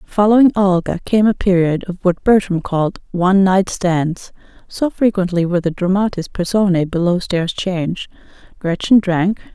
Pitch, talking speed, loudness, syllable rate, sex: 185 Hz, 145 wpm, -16 LUFS, 4.8 syllables/s, female